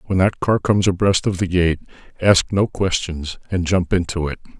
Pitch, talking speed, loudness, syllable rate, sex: 90 Hz, 195 wpm, -19 LUFS, 5.1 syllables/s, male